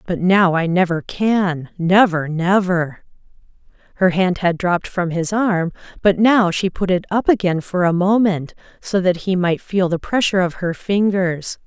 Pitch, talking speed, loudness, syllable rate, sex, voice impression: 185 Hz, 170 wpm, -18 LUFS, 4.9 syllables/s, female, very feminine, slightly middle-aged, slightly thin, slightly relaxed, powerful, bright, slightly hard, very clear, very fluent, cute, intellectual, refreshing, sincere, calm, friendly, reassuring, unique, elegant, slightly wild, sweet, slightly lively, kind, slightly sharp